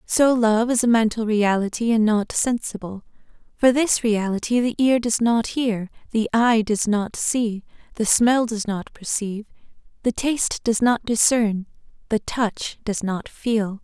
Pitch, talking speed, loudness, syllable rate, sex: 225 Hz, 160 wpm, -21 LUFS, 4.2 syllables/s, female